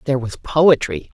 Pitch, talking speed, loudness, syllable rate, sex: 135 Hz, 150 wpm, -17 LUFS, 5.0 syllables/s, female